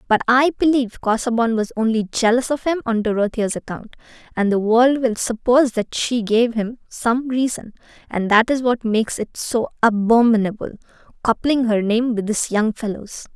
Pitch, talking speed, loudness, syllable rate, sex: 230 Hz, 165 wpm, -19 LUFS, 5.1 syllables/s, female